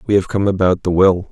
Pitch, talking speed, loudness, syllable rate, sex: 95 Hz, 275 wpm, -15 LUFS, 6.0 syllables/s, male